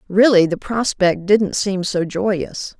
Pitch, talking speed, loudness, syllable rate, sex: 195 Hz, 150 wpm, -17 LUFS, 3.5 syllables/s, female